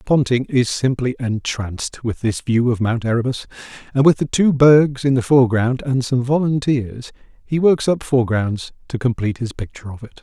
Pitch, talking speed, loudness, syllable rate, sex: 125 Hz, 180 wpm, -18 LUFS, 5.2 syllables/s, male